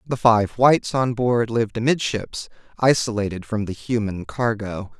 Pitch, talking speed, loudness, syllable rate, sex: 115 Hz, 145 wpm, -21 LUFS, 4.8 syllables/s, male